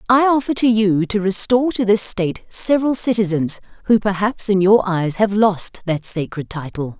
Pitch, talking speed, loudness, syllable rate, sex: 205 Hz, 180 wpm, -17 LUFS, 5.0 syllables/s, female